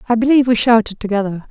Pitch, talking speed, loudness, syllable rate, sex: 225 Hz, 200 wpm, -15 LUFS, 7.5 syllables/s, female